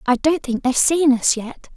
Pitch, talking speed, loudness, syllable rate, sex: 270 Hz, 240 wpm, -18 LUFS, 5.0 syllables/s, female